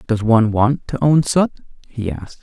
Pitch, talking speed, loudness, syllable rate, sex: 120 Hz, 200 wpm, -17 LUFS, 5.3 syllables/s, male